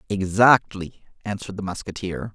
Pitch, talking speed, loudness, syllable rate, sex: 100 Hz, 100 wpm, -22 LUFS, 5.0 syllables/s, male